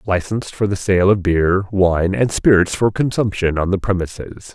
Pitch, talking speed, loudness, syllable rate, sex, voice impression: 95 Hz, 185 wpm, -17 LUFS, 4.9 syllables/s, male, very masculine, very adult-like, old, very thick, slightly tensed, slightly weak, bright, soft, muffled, slightly halting, very cool, very intellectual, sincere, very calm, very mature, very friendly, very reassuring, very unique, very elegant, slightly wild, sweet, slightly lively, very kind